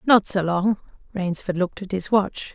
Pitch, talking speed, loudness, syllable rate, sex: 190 Hz, 190 wpm, -23 LUFS, 4.8 syllables/s, female